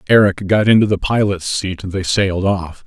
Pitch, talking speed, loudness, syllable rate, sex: 95 Hz, 210 wpm, -16 LUFS, 5.2 syllables/s, male